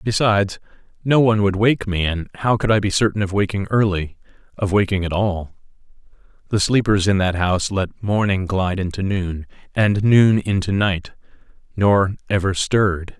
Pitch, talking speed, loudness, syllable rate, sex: 100 Hz, 155 wpm, -19 LUFS, 5.1 syllables/s, male